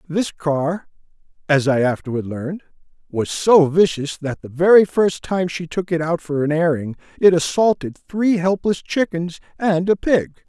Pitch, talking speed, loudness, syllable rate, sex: 170 Hz, 165 wpm, -19 LUFS, 4.5 syllables/s, male